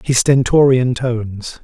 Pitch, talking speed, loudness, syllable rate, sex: 125 Hz, 110 wpm, -14 LUFS, 4.0 syllables/s, male